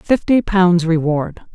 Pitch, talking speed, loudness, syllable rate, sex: 180 Hz, 115 wpm, -15 LUFS, 3.6 syllables/s, female